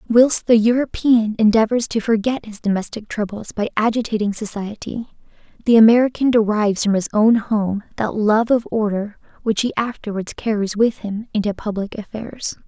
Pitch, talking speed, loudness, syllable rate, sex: 220 Hz, 150 wpm, -19 LUFS, 5.1 syllables/s, female